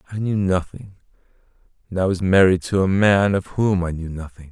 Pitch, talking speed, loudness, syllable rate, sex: 95 Hz, 200 wpm, -19 LUFS, 5.4 syllables/s, male